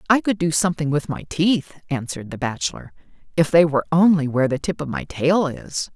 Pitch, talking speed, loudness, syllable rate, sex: 150 Hz, 210 wpm, -21 LUFS, 5.8 syllables/s, female